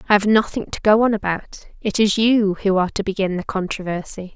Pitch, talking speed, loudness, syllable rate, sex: 200 Hz, 220 wpm, -19 LUFS, 5.8 syllables/s, female